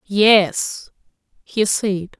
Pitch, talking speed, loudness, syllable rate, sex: 200 Hz, 80 wpm, -17 LUFS, 2.0 syllables/s, female